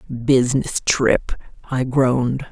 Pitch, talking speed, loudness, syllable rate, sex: 130 Hz, 95 wpm, -19 LUFS, 3.6 syllables/s, female